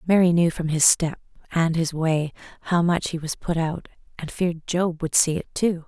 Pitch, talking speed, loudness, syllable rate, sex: 165 Hz, 215 wpm, -22 LUFS, 4.9 syllables/s, female